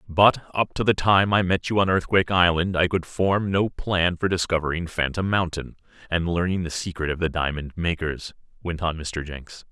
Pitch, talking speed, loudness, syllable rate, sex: 90 Hz, 200 wpm, -23 LUFS, 5.0 syllables/s, male